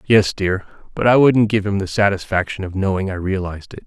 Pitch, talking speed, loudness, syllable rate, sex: 100 Hz, 215 wpm, -18 LUFS, 5.9 syllables/s, male